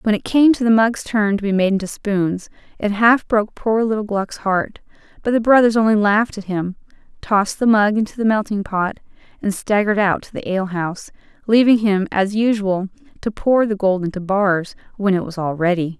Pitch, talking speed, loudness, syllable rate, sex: 205 Hz, 205 wpm, -18 LUFS, 5.4 syllables/s, female